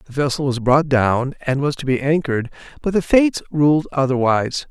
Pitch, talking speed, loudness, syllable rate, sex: 140 Hz, 190 wpm, -18 LUFS, 5.3 syllables/s, male